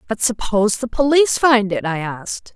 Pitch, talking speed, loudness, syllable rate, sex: 220 Hz, 190 wpm, -17 LUFS, 5.4 syllables/s, female